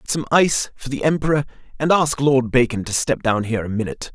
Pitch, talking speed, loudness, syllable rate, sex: 130 Hz, 230 wpm, -19 LUFS, 6.3 syllables/s, male